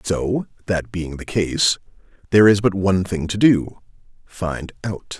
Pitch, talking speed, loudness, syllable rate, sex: 95 Hz, 125 wpm, -20 LUFS, 4.2 syllables/s, male